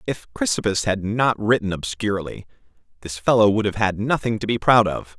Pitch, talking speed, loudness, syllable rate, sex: 105 Hz, 185 wpm, -20 LUFS, 5.4 syllables/s, male